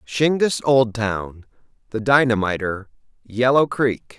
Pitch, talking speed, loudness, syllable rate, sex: 120 Hz, 70 wpm, -19 LUFS, 3.8 syllables/s, male